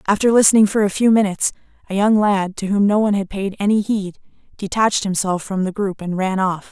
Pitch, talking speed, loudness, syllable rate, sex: 200 Hz, 225 wpm, -18 LUFS, 6.0 syllables/s, female